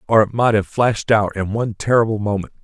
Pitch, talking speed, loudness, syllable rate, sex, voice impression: 110 Hz, 230 wpm, -18 LUFS, 6.3 syllables/s, male, masculine, adult-like, tensed, clear, fluent, cool, intellectual, sincere, slightly friendly, elegant, slightly strict, slightly sharp